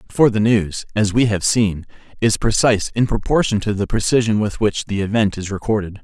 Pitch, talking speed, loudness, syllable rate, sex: 105 Hz, 200 wpm, -18 LUFS, 5.4 syllables/s, male